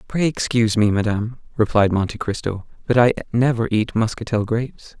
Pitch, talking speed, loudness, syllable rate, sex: 110 Hz, 155 wpm, -20 LUFS, 5.7 syllables/s, male